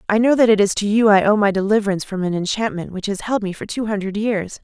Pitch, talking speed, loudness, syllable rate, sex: 205 Hz, 285 wpm, -18 LUFS, 6.5 syllables/s, female